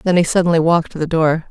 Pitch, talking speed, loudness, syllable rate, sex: 165 Hz, 280 wpm, -16 LUFS, 7.4 syllables/s, female